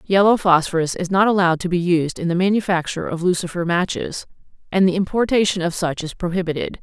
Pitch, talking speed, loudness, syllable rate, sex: 180 Hz, 185 wpm, -19 LUFS, 6.2 syllables/s, female